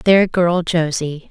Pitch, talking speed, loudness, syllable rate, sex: 170 Hz, 140 wpm, -17 LUFS, 3.2 syllables/s, female